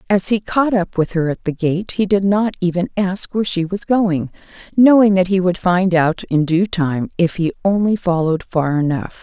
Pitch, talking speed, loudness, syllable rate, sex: 185 Hz, 215 wpm, -17 LUFS, 4.9 syllables/s, female